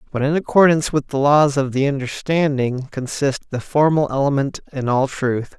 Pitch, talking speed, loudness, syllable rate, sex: 140 Hz, 170 wpm, -19 LUFS, 5.0 syllables/s, male